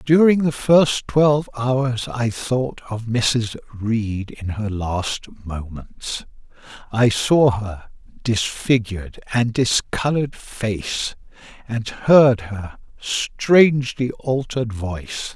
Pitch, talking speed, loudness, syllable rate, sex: 120 Hz, 105 wpm, -20 LUFS, 3.2 syllables/s, male